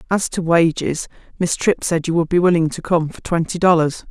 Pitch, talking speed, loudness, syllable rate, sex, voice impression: 170 Hz, 220 wpm, -18 LUFS, 5.3 syllables/s, female, feminine, middle-aged, tensed, clear, fluent, intellectual, calm, reassuring, elegant, slightly strict